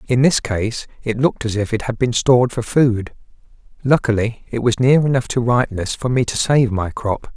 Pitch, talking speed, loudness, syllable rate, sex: 120 Hz, 210 wpm, -18 LUFS, 5.3 syllables/s, male